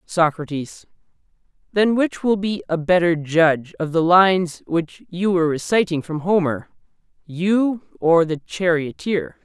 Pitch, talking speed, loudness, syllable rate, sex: 175 Hz, 135 wpm, -19 LUFS, 4.1 syllables/s, male